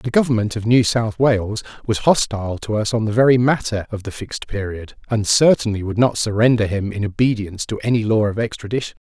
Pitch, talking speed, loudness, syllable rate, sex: 110 Hz, 205 wpm, -19 LUFS, 5.9 syllables/s, male